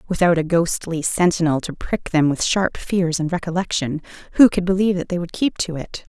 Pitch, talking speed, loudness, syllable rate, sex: 175 Hz, 205 wpm, -20 LUFS, 5.4 syllables/s, female